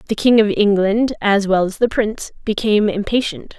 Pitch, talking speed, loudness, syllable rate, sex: 210 Hz, 185 wpm, -17 LUFS, 5.4 syllables/s, female